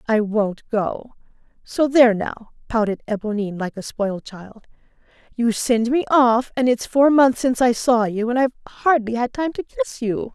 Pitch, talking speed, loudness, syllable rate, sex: 235 Hz, 185 wpm, -20 LUFS, 4.9 syllables/s, female